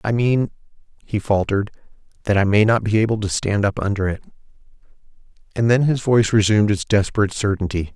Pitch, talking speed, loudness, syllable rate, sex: 105 Hz, 175 wpm, -19 LUFS, 6.4 syllables/s, male